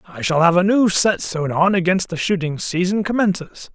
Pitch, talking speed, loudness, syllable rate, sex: 180 Hz, 210 wpm, -18 LUFS, 5.3 syllables/s, male